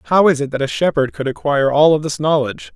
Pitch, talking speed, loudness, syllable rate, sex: 145 Hz, 260 wpm, -16 LUFS, 6.3 syllables/s, male